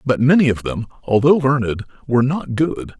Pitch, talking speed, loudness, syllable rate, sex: 130 Hz, 180 wpm, -17 LUFS, 5.3 syllables/s, male